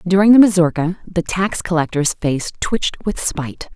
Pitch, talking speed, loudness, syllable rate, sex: 175 Hz, 160 wpm, -17 LUFS, 5.0 syllables/s, female